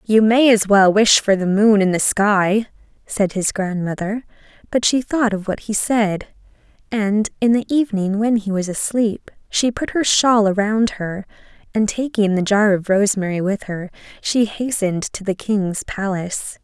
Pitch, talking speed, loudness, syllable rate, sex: 210 Hz, 175 wpm, -18 LUFS, 4.5 syllables/s, female